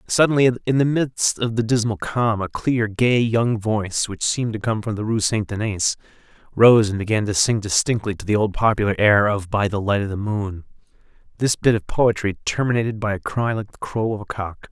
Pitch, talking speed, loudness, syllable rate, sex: 110 Hz, 220 wpm, -20 LUFS, 5.3 syllables/s, male